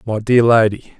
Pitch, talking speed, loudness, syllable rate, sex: 110 Hz, 180 wpm, -14 LUFS, 4.9 syllables/s, male